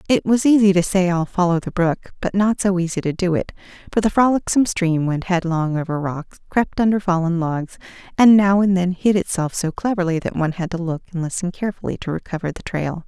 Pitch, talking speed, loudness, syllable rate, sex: 180 Hz, 220 wpm, -19 LUFS, 5.8 syllables/s, female